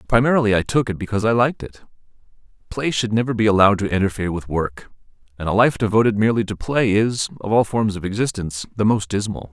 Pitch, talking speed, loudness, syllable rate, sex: 105 Hz, 210 wpm, -19 LUFS, 6.8 syllables/s, male